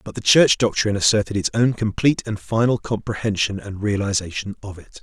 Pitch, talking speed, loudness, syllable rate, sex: 105 Hz, 180 wpm, -20 LUFS, 5.8 syllables/s, male